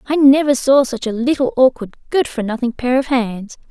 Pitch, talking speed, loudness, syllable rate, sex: 255 Hz, 210 wpm, -16 LUFS, 5.1 syllables/s, female